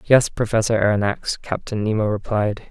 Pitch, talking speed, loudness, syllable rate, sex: 110 Hz, 135 wpm, -21 LUFS, 5.1 syllables/s, male